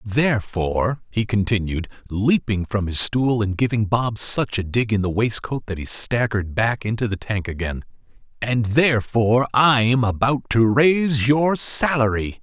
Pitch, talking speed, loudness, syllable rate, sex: 115 Hz, 165 wpm, -20 LUFS, 4.7 syllables/s, male